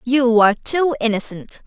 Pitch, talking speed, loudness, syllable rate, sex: 240 Hz, 145 wpm, -17 LUFS, 4.6 syllables/s, female